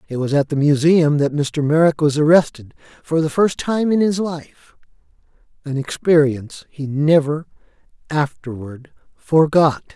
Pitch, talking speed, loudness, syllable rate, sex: 150 Hz, 140 wpm, -17 LUFS, 4.4 syllables/s, male